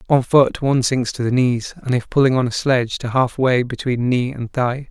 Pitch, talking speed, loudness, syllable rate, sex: 125 Hz, 235 wpm, -18 LUFS, 5.2 syllables/s, male